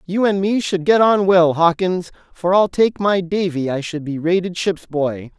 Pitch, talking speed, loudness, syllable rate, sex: 180 Hz, 210 wpm, -17 LUFS, 4.4 syllables/s, male